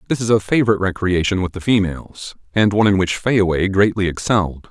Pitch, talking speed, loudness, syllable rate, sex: 100 Hz, 190 wpm, -17 LUFS, 6.2 syllables/s, male